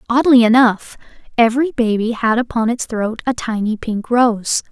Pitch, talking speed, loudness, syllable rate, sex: 230 Hz, 155 wpm, -16 LUFS, 4.7 syllables/s, female